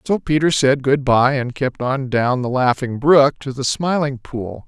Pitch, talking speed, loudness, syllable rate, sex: 135 Hz, 205 wpm, -18 LUFS, 4.2 syllables/s, male